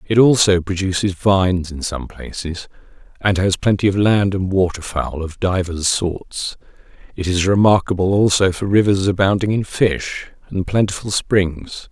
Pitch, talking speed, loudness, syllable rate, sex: 95 Hz, 150 wpm, -18 LUFS, 4.5 syllables/s, male